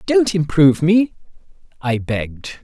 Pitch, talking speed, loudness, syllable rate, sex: 160 Hz, 115 wpm, -17 LUFS, 4.6 syllables/s, male